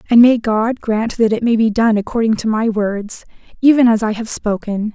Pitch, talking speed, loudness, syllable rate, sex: 220 Hz, 220 wpm, -15 LUFS, 5.0 syllables/s, female